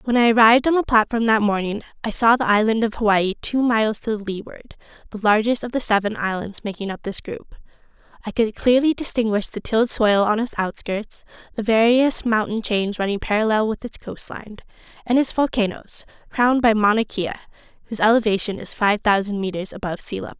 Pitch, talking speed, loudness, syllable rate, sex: 220 Hz, 185 wpm, -20 LUFS, 5.8 syllables/s, female